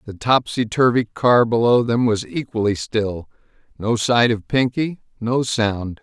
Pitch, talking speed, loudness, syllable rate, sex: 120 Hz, 150 wpm, -19 LUFS, 4.0 syllables/s, male